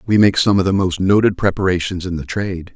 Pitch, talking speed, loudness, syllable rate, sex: 95 Hz, 240 wpm, -17 LUFS, 6.1 syllables/s, male